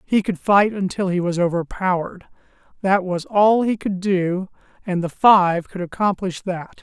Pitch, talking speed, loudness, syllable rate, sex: 190 Hz, 165 wpm, -20 LUFS, 4.5 syllables/s, male